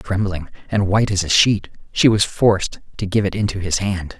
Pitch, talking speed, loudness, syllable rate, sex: 100 Hz, 215 wpm, -18 LUFS, 5.3 syllables/s, male